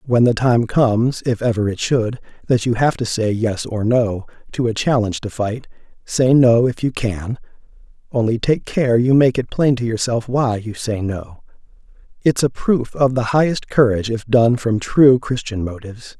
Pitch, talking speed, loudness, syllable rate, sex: 120 Hz, 190 wpm, -18 LUFS, 4.7 syllables/s, male